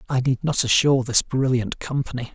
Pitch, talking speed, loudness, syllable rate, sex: 130 Hz, 180 wpm, -21 LUFS, 5.5 syllables/s, male